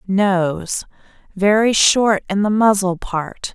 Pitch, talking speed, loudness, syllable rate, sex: 200 Hz, 100 wpm, -17 LUFS, 3.1 syllables/s, female